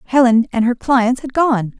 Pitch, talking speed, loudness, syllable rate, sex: 245 Hz, 200 wpm, -15 LUFS, 5.1 syllables/s, female